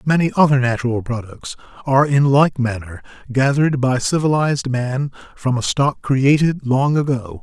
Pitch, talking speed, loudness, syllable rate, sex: 135 Hz, 145 wpm, -17 LUFS, 4.9 syllables/s, male